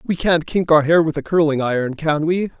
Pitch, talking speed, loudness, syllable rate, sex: 160 Hz, 255 wpm, -17 LUFS, 5.3 syllables/s, male